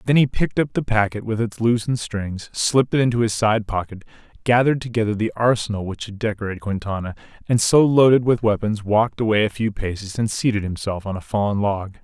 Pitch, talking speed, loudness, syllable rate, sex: 110 Hz, 205 wpm, -20 LUFS, 6.0 syllables/s, male